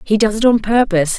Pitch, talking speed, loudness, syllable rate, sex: 210 Hz, 250 wpm, -14 LUFS, 6.5 syllables/s, female